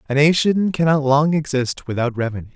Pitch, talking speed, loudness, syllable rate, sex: 145 Hz, 165 wpm, -18 LUFS, 5.5 syllables/s, male